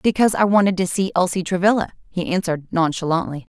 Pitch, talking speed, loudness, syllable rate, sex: 185 Hz, 170 wpm, -19 LUFS, 6.6 syllables/s, female